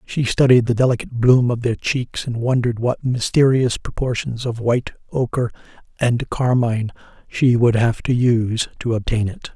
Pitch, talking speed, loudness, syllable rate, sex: 120 Hz, 165 wpm, -19 LUFS, 5.1 syllables/s, male